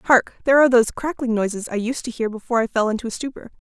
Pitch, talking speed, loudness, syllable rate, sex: 235 Hz, 260 wpm, -20 LUFS, 7.7 syllables/s, female